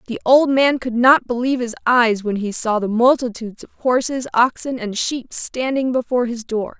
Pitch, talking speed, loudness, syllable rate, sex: 240 Hz, 195 wpm, -18 LUFS, 5.0 syllables/s, female